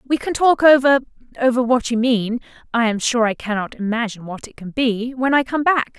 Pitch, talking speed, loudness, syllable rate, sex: 245 Hz, 210 wpm, -18 LUFS, 3.3 syllables/s, female